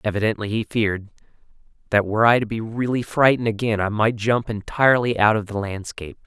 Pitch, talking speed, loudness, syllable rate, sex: 110 Hz, 180 wpm, -21 LUFS, 6.2 syllables/s, male